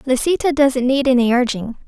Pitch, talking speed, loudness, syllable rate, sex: 260 Hz, 160 wpm, -16 LUFS, 5.3 syllables/s, female